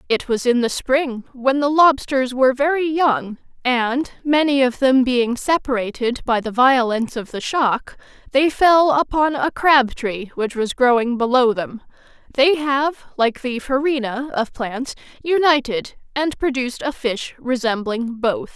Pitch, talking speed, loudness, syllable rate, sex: 255 Hz, 155 wpm, -19 LUFS, 4.2 syllables/s, female